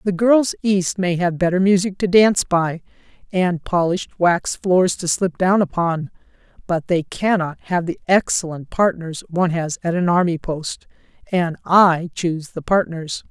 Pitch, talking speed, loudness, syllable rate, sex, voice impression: 175 Hz, 160 wpm, -19 LUFS, 4.6 syllables/s, female, very feminine, very adult-like, slightly middle-aged, thin, slightly tensed, slightly powerful, slightly dark, hard, clear, fluent, cool, very intellectual, refreshing, sincere, slightly calm, friendly, reassuring, very unique, elegant, wild, sweet, lively, slightly strict, slightly intense